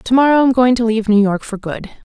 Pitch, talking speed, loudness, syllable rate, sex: 230 Hz, 285 wpm, -14 LUFS, 6.0 syllables/s, female